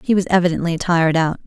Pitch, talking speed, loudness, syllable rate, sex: 170 Hz, 205 wpm, -17 LUFS, 7.0 syllables/s, female